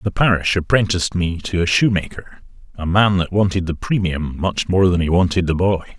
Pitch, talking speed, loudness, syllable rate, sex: 90 Hz, 210 wpm, -18 LUFS, 5.3 syllables/s, male